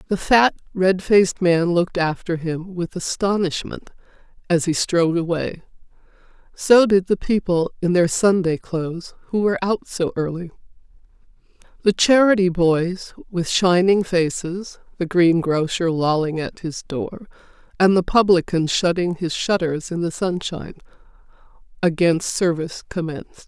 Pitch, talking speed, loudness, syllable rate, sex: 175 Hz, 130 wpm, -20 LUFS, 4.6 syllables/s, female